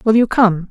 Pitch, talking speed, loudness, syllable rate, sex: 210 Hz, 255 wpm, -14 LUFS, 4.9 syllables/s, female